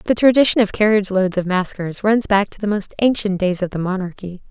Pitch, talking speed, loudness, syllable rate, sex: 200 Hz, 225 wpm, -18 LUFS, 5.8 syllables/s, female